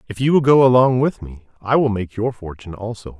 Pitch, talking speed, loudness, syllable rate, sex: 115 Hz, 245 wpm, -17 LUFS, 5.9 syllables/s, male